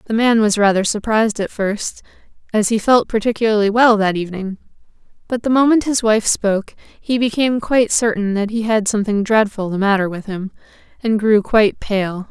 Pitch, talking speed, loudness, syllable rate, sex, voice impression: 215 Hz, 180 wpm, -17 LUFS, 5.5 syllables/s, female, very feminine, slightly young, slightly adult-like, thin, slightly relaxed, slightly weak, slightly bright, slightly soft, clear, fluent, cute, very intellectual, very refreshing, slightly sincere, calm, friendly, reassuring, slightly unique, slightly elegant, sweet, slightly lively, kind, slightly modest